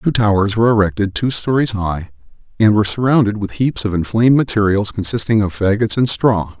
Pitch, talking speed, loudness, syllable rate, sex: 105 Hz, 180 wpm, -15 LUFS, 5.8 syllables/s, male